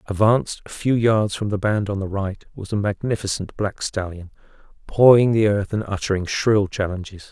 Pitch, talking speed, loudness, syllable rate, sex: 100 Hz, 180 wpm, -21 LUFS, 5.1 syllables/s, male